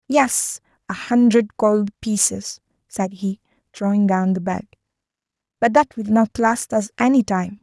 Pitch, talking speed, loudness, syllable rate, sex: 215 Hz, 150 wpm, -19 LUFS, 4.1 syllables/s, female